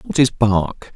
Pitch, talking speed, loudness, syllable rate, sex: 120 Hz, 190 wpm, -17 LUFS, 3.3 syllables/s, male